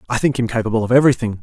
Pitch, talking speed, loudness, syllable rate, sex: 120 Hz, 255 wpm, -17 LUFS, 8.8 syllables/s, male